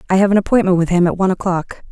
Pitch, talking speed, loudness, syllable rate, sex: 185 Hz, 280 wpm, -15 LUFS, 7.9 syllables/s, female